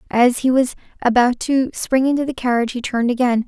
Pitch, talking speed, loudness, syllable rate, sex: 250 Hz, 205 wpm, -18 LUFS, 6.1 syllables/s, female